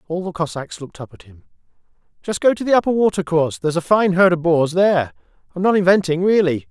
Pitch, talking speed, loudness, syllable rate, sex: 170 Hz, 225 wpm, -17 LUFS, 6.5 syllables/s, male